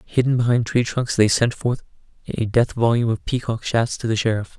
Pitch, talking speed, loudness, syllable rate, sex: 115 Hz, 210 wpm, -20 LUFS, 5.4 syllables/s, male